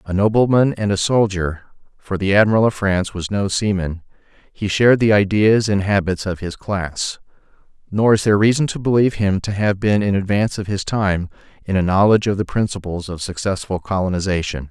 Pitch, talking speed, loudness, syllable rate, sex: 100 Hz, 180 wpm, -18 LUFS, 5.7 syllables/s, male